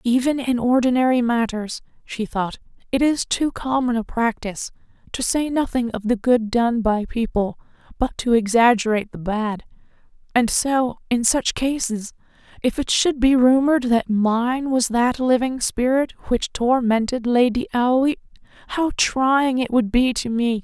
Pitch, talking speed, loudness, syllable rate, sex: 245 Hz, 155 wpm, -20 LUFS, 4.5 syllables/s, female